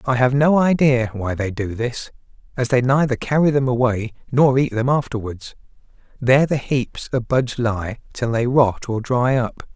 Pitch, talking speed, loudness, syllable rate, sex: 125 Hz, 185 wpm, -19 LUFS, 4.6 syllables/s, male